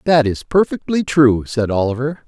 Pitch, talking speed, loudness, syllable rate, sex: 130 Hz, 160 wpm, -17 LUFS, 4.7 syllables/s, male